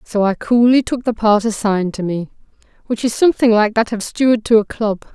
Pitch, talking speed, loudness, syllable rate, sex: 220 Hz, 220 wpm, -16 LUFS, 5.6 syllables/s, female